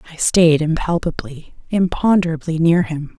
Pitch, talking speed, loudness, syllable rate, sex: 165 Hz, 115 wpm, -17 LUFS, 4.7 syllables/s, female